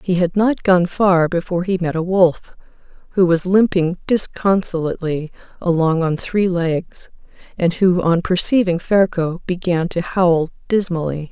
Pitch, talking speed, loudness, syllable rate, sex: 175 Hz, 145 wpm, -17 LUFS, 4.4 syllables/s, female